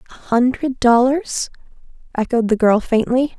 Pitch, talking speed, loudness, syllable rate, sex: 245 Hz, 125 wpm, -17 LUFS, 4.5 syllables/s, female